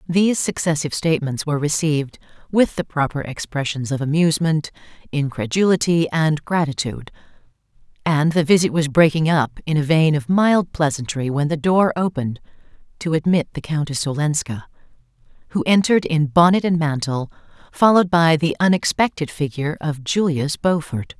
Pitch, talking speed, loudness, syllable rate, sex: 155 Hz, 140 wpm, -19 LUFS, 5.4 syllables/s, female